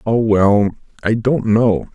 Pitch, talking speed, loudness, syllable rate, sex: 110 Hz, 155 wpm, -16 LUFS, 3.4 syllables/s, male